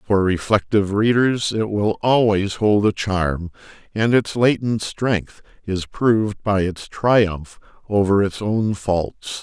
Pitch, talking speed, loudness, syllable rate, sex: 100 Hz, 140 wpm, -19 LUFS, 3.6 syllables/s, male